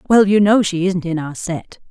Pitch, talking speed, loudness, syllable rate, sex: 185 Hz, 250 wpm, -16 LUFS, 4.9 syllables/s, female